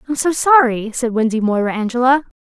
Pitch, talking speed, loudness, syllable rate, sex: 245 Hz, 175 wpm, -16 LUFS, 5.8 syllables/s, female